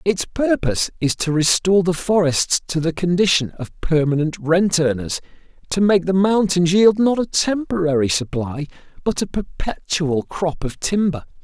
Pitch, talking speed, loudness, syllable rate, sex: 170 Hz, 150 wpm, -19 LUFS, 4.6 syllables/s, male